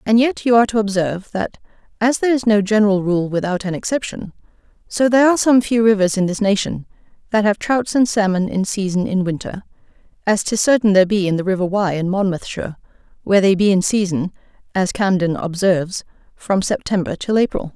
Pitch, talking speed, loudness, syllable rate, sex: 200 Hz, 195 wpm, -17 LUFS, 6.0 syllables/s, female